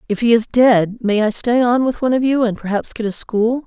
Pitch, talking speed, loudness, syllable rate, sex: 230 Hz, 280 wpm, -16 LUFS, 5.5 syllables/s, female